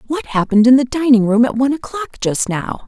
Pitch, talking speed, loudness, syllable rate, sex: 250 Hz, 230 wpm, -15 LUFS, 6.2 syllables/s, female